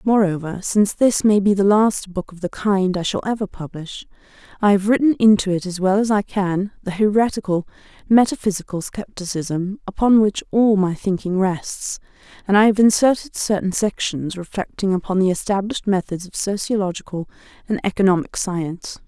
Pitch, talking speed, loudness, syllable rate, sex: 195 Hz, 160 wpm, -19 LUFS, 5.3 syllables/s, female